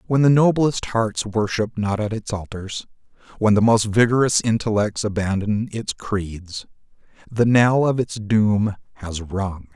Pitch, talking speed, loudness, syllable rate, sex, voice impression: 105 Hz, 150 wpm, -20 LUFS, 4.0 syllables/s, male, masculine, middle-aged, clear, fluent, slightly raspy, cool, sincere, slightly mature, friendly, wild, lively, kind